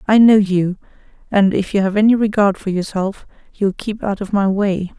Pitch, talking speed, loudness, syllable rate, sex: 200 Hz, 205 wpm, -16 LUFS, 5.0 syllables/s, female